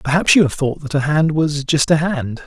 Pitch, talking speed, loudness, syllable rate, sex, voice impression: 150 Hz, 270 wpm, -16 LUFS, 5.1 syllables/s, male, very masculine, slightly old, thick, tensed, very powerful, slightly bright, slightly hard, slightly muffled, fluent, raspy, cool, intellectual, refreshing, sincere, slightly calm, mature, slightly friendly, slightly reassuring, very unique, slightly elegant, wild, very lively, slightly strict, intense